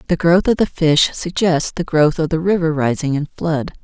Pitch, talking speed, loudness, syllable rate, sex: 160 Hz, 220 wpm, -17 LUFS, 5.0 syllables/s, female